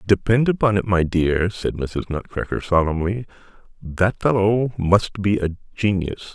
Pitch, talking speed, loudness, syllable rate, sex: 95 Hz, 140 wpm, -21 LUFS, 4.2 syllables/s, male